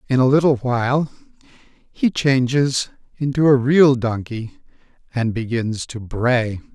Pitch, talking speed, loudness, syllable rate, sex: 125 Hz, 125 wpm, -19 LUFS, 3.9 syllables/s, male